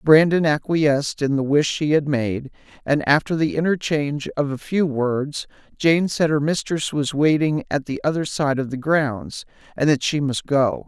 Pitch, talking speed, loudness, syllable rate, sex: 145 Hz, 190 wpm, -20 LUFS, 4.5 syllables/s, male